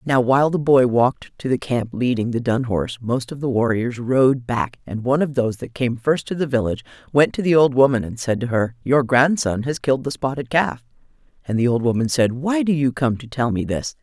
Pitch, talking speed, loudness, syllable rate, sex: 130 Hz, 245 wpm, -20 LUFS, 5.6 syllables/s, female